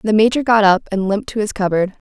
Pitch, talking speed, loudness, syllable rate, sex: 210 Hz, 255 wpm, -16 LUFS, 6.7 syllables/s, female